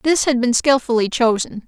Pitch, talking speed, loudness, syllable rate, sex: 245 Hz, 180 wpm, -17 LUFS, 5.1 syllables/s, female